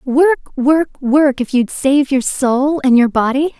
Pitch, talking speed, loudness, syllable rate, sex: 275 Hz, 185 wpm, -14 LUFS, 3.9 syllables/s, female